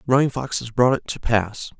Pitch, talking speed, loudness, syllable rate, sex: 120 Hz, 235 wpm, -21 LUFS, 5.1 syllables/s, male